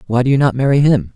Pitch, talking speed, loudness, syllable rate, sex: 125 Hz, 315 wpm, -14 LUFS, 7.1 syllables/s, male